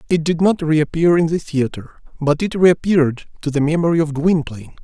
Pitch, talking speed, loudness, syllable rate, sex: 160 Hz, 185 wpm, -17 LUFS, 5.5 syllables/s, male